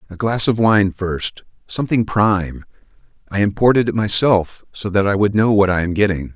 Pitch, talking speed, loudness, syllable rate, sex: 100 Hz, 170 wpm, -17 LUFS, 5.2 syllables/s, male